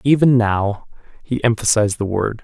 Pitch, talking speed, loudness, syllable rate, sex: 115 Hz, 150 wpm, -17 LUFS, 3.1 syllables/s, male